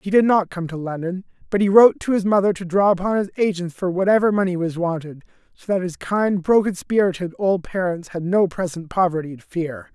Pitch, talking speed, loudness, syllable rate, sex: 185 Hz, 215 wpm, -20 LUFS, 5.7 syllables/s, male